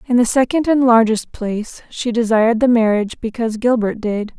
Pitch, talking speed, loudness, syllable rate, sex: 230 Hz, 180 wpm, -16 LUFS, 5.5 syllables/s, female